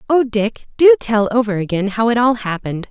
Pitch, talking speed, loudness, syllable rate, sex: 225 Hz, 205 wpm, -16 LUFS, 5.4 syllables/s, female